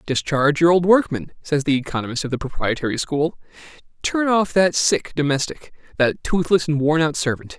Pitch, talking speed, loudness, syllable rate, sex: 155 Hz, 175 wpm, -20 LUFS, 5.4 syllables/s, male